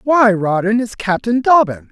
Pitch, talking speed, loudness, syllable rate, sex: 215 Hz, 155 wpm, -15 LUFS, 4.4 syllables/s, male